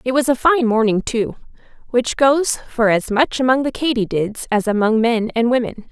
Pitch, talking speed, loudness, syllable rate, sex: 240 Hz, 205 wpm, -17 LUFS, 4.9 syllables/s, female